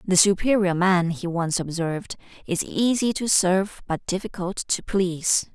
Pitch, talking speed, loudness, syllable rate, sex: 185 Hz, 150 wpm, -23 LUFS, 4.6 syllables/s, female